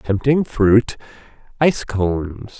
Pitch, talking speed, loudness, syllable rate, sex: 115 Hz, 90 wpm, -18 LUFS, 3.7 syllables/s, male